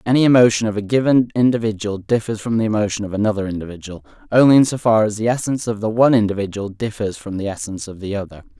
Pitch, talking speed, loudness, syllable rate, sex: 110 Hz, 215 wpm, -18 LUFS, 7.1 syllables/s, male